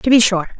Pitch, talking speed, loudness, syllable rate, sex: 215 Hz, 300 wpm, -14 LUFS, 6.3 syllables/s, female